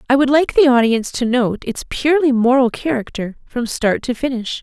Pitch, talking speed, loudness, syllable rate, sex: 255 Hz, 195 wpm, -17 LUFS, 5.4 syllables/s, female